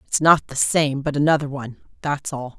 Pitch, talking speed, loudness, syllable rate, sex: 145 Hz, 210 wpm, -20 LUFS, 5.4 syllables/s, female